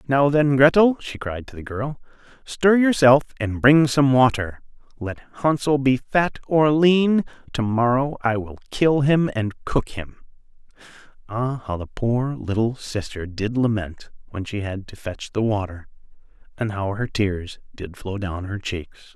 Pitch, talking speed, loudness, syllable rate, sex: 120 Hz, 165 wpm, -21 LUFS, 4.1 syllables/s, male